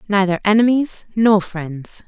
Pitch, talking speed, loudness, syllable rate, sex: 200 Hz, 115 wpm, -17 LUFS, 4.0 syllables/s, female